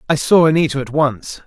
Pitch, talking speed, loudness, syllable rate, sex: 145 Hz, 205 wpm, -15 LUFS, 5.5 syllables/s, male